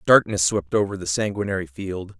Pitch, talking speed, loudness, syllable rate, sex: 95 Hz, 165 wpm, -22 LUFS, 5.4 syllables/s, male